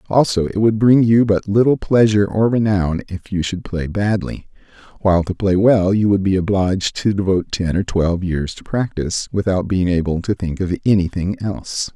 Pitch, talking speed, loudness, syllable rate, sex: 100 Hz, 195 wpm, -17 LUFS, 5.3 syllables/s, male